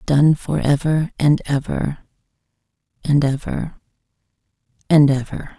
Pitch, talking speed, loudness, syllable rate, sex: 145 Hz, 95 wpm, -18 LUFS, 4.1 syllables/s, female